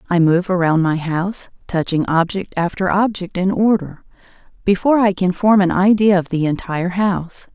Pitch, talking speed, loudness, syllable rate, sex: 185 Hz, 165 wpm, -17 LUFS, 5.2 syllables/s, female